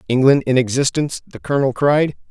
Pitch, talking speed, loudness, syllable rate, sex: 130 Hz, 155 wpm, -17 LUFS, 6.1 syllables/s, male